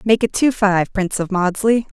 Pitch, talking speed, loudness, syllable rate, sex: 205 Hz, 210 wpm, -17 LUFS, 5.6 syllables/s, female